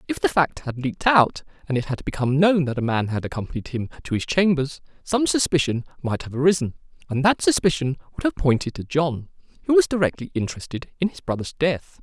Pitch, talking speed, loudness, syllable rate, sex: 150 Hz, 205 wpm, -22 LUFS, 6.1 syllables/s, male